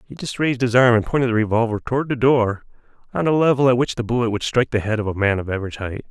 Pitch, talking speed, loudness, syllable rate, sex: 120 Hz, 285 wpm, -19 LUFS, 7.5 syllables/s, male